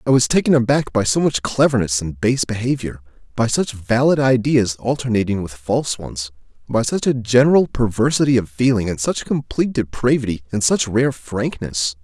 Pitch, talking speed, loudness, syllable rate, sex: 115 Hz, 170 wpm, -18 LUFS, 5.2 syllables/s, male